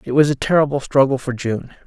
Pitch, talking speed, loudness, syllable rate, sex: 135 Hz, 225 wpm, -18 LUFS, 5.9 syllables/s, male